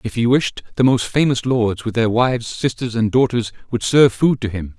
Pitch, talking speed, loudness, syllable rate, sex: 120 Hz, 225 wpm, -18 LUFS, 5.3 syllables/s, male